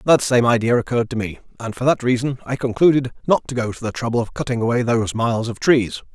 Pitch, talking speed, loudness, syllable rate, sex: 120 Hz, 245 wpm, -19 LUFS, 6.5 syllables/s, male